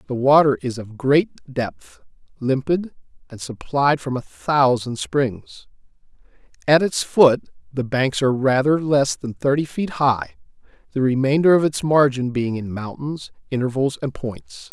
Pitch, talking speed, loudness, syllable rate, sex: 135 Hz, 145 wpm, -20 LUFS, 4.3 syllables/s, male